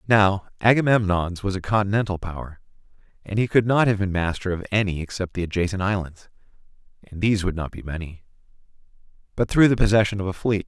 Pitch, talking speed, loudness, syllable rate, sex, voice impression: 100 Hz, 180 wpm, -22 LUFS, 5.7 syllables/s, male, masculine, adult-like, cool, slightly refreshing, sincere, slightly calm, friendly